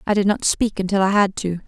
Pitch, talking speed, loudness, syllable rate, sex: 200 Hz, 285 wpm, -19 LUFS, 6.0 syllables/s, female